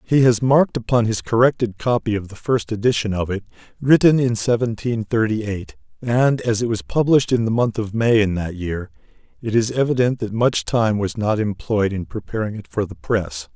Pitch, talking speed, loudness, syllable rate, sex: 115 Hz, 205 wpm, -20 LUFS, 5.3 syllables/s, male